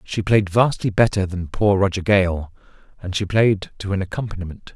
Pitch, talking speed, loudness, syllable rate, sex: 95 Hz, 175 wpm, -20 LUFS, 5.1 syllables/s, male